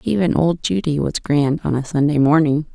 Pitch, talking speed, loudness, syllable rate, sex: 150 Hz, 195 wpm, -18 LUFS, 5.3 syllables/s, female